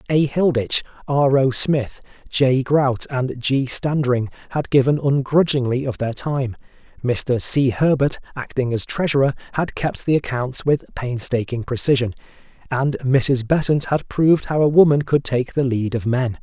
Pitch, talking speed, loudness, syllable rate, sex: 135 Hz, 155 wpm, -19 LUFS, 4.4 syllables/s, male